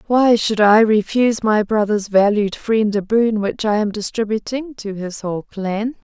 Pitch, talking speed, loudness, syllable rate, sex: 215 Hz, 175 wpm, -17 LUFS, 4.5 syllables/s, female